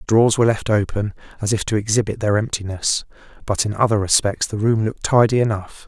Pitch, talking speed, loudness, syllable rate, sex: 105 Hz, 195 wpm, -19 LUFS, 6.1 syllables/s, male